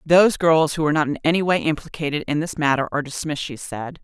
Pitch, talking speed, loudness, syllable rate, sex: 155 Hz, 240 wpm, -21 LUFS, 6.8 syllables/s, female